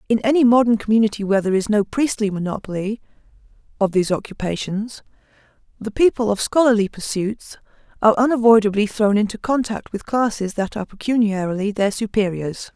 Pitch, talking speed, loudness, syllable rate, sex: 215 Hz, 140 wpm, -19 LUFS, 6.0 syllables/s, female